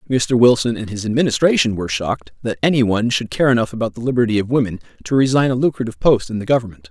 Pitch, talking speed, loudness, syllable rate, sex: 120 Hz, 225 wpm, -17 LUFS, 7.3 syllables/s, male